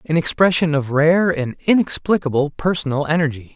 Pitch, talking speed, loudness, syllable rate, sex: 155 Hz, 135 wpm, -18 LUFS, 5.4 syllables/s, male